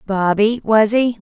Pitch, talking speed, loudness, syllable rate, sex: 215 Hz, 140 wpm, -16 LUFS, 3.9 syllables/s, female